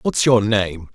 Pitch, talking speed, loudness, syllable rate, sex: 110 Hz, 190 wpm, -18 LUFS, 3.7 syllables/s, male